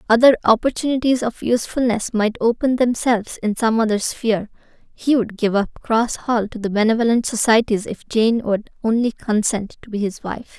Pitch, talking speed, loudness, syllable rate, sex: 225 Hz, 170 wpm, -19 LUFS, 5.3 syllables/s, female